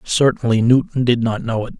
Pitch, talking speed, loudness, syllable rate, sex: 120 Hz, 200 wpm, -17 LUFS, 5.4 syllables/s, male